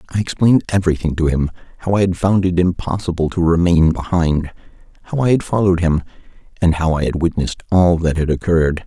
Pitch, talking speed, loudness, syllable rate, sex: 85 Hz, 190 wpm, -17 LUFS, 6.2 syllables/s, male